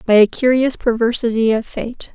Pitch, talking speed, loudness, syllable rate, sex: 235 Hz, 170 wpm, -16 LUFS, 5.0 syllables/s, female